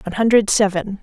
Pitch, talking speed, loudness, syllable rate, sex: 205 Hz, 175 wpm, -16 LUFS, 6.6 syllables/s, female